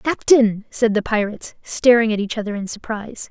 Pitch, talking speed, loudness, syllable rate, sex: 220 Hz, 200 wpm, -19 LUFS, 5.7 syllables/s, female